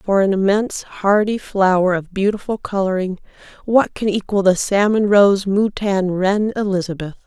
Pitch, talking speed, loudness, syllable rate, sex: 195 Hz, 140 wpm, -17 LUFS, 4.8 syllables/s, female